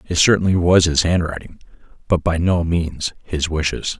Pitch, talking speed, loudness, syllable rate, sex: 85 Hz, 165 wpm, -18 LUFS, 4.9 syllables/s, male